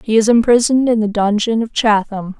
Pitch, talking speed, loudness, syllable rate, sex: 220 Hz, 200 wpm, -14 LUFS, 5.7 syllables/s, female